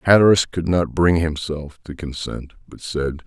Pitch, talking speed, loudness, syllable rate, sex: 80 Hz, 165 wpm, -20 LUFS, 4.7 syllables/s, male